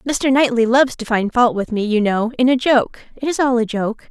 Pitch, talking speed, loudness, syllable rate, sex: 240 Hz, 235 wpm, -17 LUFS, 5.3 syllables/s, female